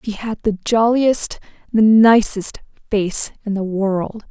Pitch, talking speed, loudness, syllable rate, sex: 210 Hz, 140 wpm, -17 LUFS, 3.5 syllables/s, female